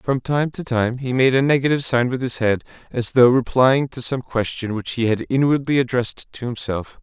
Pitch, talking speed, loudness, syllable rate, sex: 125 Hz, 215 wpm, -20 LUFS, 5.2 syllables/s, male